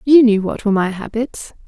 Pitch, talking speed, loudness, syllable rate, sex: 220 Hz, 215 wpm, -16 LUFS, 5.5 syllables/s, female